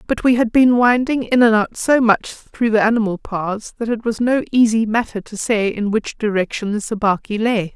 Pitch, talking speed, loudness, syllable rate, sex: 220 Hz, 215 wpm, -17 LUFS, 5.0 syllables/s, female